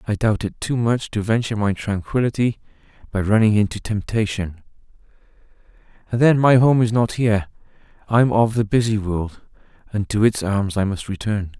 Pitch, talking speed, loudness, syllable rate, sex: 105 Hz, 165 wpm, -20 LUFS, 5.2 syllables/s, male